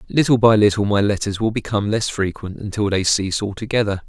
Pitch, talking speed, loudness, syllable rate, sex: 105 Hz, 190 wpm, -19 LUFS, 6.2 syllables/s, male